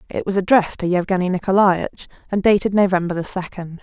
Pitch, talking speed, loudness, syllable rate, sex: 185 Hz, 175 wpm, -18 LUFS, 6.5 syllables/s, female